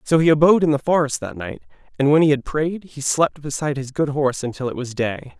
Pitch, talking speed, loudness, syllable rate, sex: 145 Hz, 255 wpm, -20 LUFS, 6.1 syllables/s, male